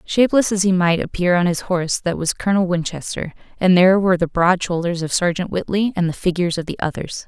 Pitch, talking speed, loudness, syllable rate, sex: 180 Hz, 225 wpm, -18 LUFS, 6.3 syllables/s, female